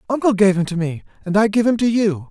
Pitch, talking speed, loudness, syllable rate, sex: 200 Hz, 285 wpm, -18 LUFS, 6.3 syllables/s, male